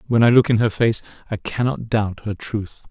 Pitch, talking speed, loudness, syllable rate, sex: 110 Hz, 225 wpm, -20 LUFS, 5.2 syllables/s, male